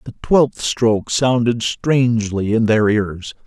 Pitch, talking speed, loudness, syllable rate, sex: 115 Hz, 140 wpm, -17 LUFS, 3.7 syllables/s, male